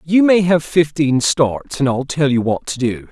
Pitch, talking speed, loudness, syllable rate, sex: 145 Hz, 230 wpm, -16 LUFS, 4.3 syllables/s, male